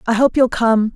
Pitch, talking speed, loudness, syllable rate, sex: 235 Hz, 255 wpm, -15 LUFS, 6.3 syllables/s, female